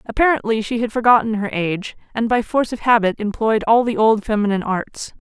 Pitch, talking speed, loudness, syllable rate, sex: 225 Hz, 195 wpm, -18 LUFS, 5.9 syllables/s, female